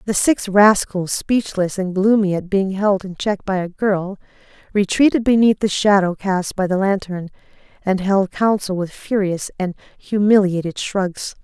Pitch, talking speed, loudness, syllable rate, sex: 195 Hz, 155 wpm, -18 LUFS, 4.3 syllables/s, female